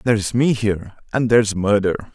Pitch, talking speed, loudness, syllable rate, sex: 105 Hz, 140 wpm, -19 LUFS, 5.9 syllables/s, male